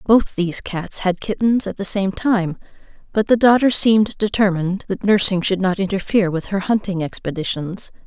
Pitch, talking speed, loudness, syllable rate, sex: 195 Hz, 170 wpm, -18 LUFS, 5.2 syllables/s, female